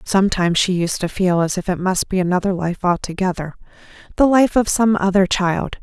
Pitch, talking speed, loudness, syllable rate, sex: 185 Hz, 195 wpm, -18 LUFS, 5.6 syllables/s, female